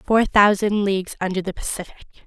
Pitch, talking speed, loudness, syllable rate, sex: 195 Hz, 160 wpm, -20 LUFS, 5.8 syllables/s, female